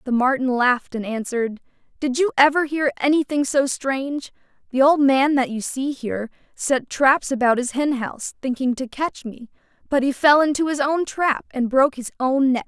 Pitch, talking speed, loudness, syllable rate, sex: 265 Hz, 195 wpm, -20 LUFS, 5.1 syllables/s, female